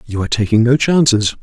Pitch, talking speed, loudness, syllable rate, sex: 120 Hz, 210 wpm, -14 LUFS, 6.5 syllables/s, male